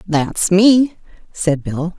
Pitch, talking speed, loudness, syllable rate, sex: 185 Hz, 120 wpm, -15 LUFS, 2.7 syllables/s, female